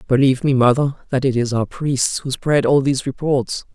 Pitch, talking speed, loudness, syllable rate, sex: 135 Hz, 210 wpm, -18 LUFS, 5.4 syllables/s, female